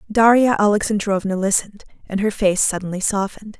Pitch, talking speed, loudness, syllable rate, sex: 205 Hz, 135 wpm, -18 LUFS, 6.0 syllables/s, female